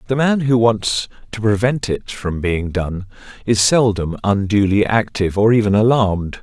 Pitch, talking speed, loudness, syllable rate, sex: 105 Hz, 160 wpm, -17 LUFS, 4.7 syllables/s, male